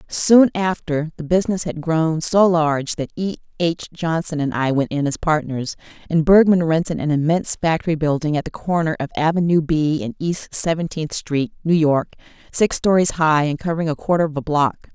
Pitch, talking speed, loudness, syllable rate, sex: 160 Hz, 190 wpm, -19 LUFS, 5.3 syllables/s, female